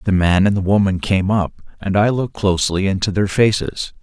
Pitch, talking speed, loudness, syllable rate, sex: 100 Hz, 210 wpm, -17 LUFS, 5.6 syllables/s, male